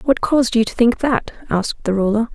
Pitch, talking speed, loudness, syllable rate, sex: 235 Hz, 230 wpm, -18 LUFS, 5.7 syllables/s, female